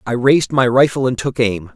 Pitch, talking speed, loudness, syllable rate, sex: 125 Hz, 240 wpm, -15 LUFS, 5.5 syllables/s, male